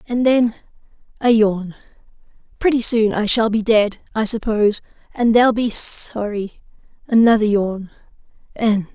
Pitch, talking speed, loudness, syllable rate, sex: 220 Hz, 95 wpm, -17 LUFS, 4.4 syllables/s, female